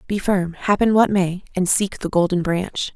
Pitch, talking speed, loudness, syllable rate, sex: 185 Hz, 205 wpm, -20 LUFS, 4.5 syllables/s, female